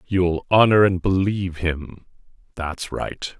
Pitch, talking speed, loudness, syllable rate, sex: 90 Hz, 105 wpm, -20 LUFS, 3.7 syllables/s, male